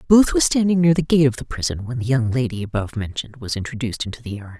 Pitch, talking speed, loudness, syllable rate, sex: 130 Hz, 260 wpm, -20 LUFS, 7.0 syllables/s, female